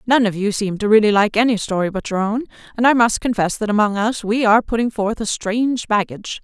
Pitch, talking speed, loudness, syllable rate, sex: 215 Hz, 245 wpm, -18 LUFS, 6.0 syllables/s, female